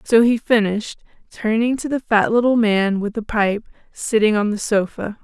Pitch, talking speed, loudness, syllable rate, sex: 220 Hz, 185 wpm, -18 LUFS, 4.8 syllables/s, female